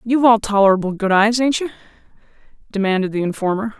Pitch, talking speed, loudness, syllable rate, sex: 215 Hz, 160 wpm, -17 LUFS, 6.8 syllables/s, female